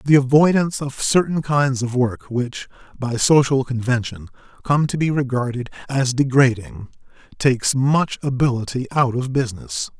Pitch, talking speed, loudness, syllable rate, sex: 130 Hz, 140 wpm, -19 LUFS, 4.8 syllables/s, male